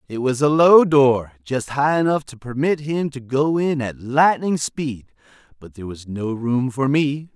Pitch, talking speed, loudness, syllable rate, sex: 135 Hz, 195 wpm, -19 LUFS, 4.3 syllables/s, male